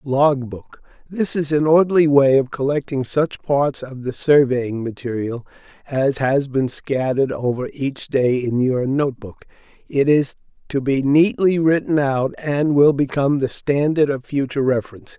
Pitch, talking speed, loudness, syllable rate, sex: 140 Hz, 160 wpm, -19 LUFS, 4.5 syllables/s, male